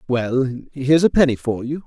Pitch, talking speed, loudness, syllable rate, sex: 135 Hz, 195 wpm, -19 LUFS, 5.4 syllables/s, male